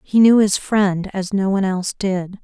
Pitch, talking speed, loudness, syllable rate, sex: 195 Hz, 220 wpm, -18 LUFS, 4.9 syllables/s, female